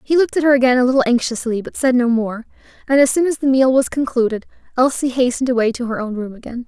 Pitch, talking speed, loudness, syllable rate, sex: 250 Hz, 250 wpm, -17 LUFS, 6.8 syllables/s, female